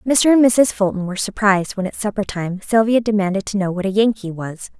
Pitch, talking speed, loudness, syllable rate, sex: 205 Hz, 225 wpm, -18 LUFS, 5.9 syllables/s, female